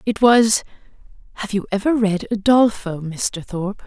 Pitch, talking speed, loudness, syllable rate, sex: 205 Hz, 140 wpm, -18 LUFS, 4.6 syllables/s, female